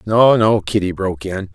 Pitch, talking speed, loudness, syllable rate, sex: 105 Hz, 195 wpm, -16 LUFS, 5.0 syllables/s, male